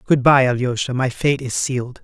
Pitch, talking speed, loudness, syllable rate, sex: 130 Hz, 205 wpm, -18 LUFS, 5.2 syllables/s, male